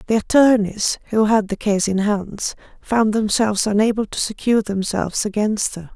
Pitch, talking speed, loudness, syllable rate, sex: 210 Hz, 160 wpm, -19 LUFS, 5.0 syllables/s, female